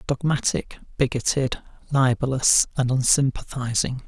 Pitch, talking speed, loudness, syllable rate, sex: 130 Hz, 75 wpm, -22 LUFS, 4.4 syllables/s, male